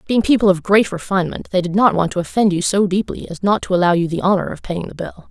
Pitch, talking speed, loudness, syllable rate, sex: 190 Hz, 285 wpm, -17 LUFS, 6.5 syllables/s, female